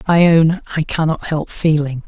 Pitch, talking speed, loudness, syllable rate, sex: 160 Hz, 200 wpm, -16 LUFS, 4.6 syllables/s, male